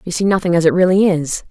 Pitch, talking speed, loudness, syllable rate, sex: 180 Hz, 280 wpm, -14 LUFS, 6.5 syllables/s, female